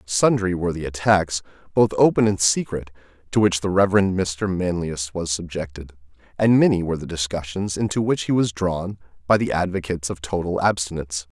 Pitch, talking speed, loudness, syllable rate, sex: 90 Hz, 170 wpm, -21 LUFS, 5.5 syllables/s, male